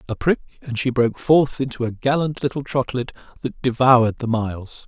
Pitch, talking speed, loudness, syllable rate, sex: 125 Hz, 185 wpm, -20 LUFS, 5.5 syllables/s, male